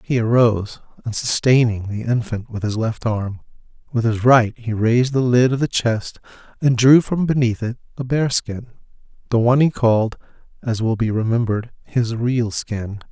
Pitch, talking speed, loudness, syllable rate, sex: 115 Hz, 175 wpm, -19 LUFS, 4.9 syllables/s, male